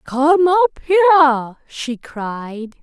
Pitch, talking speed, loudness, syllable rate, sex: 290 Hz, 105 wpm, -15 LUFS, 3.6 syllables/s, female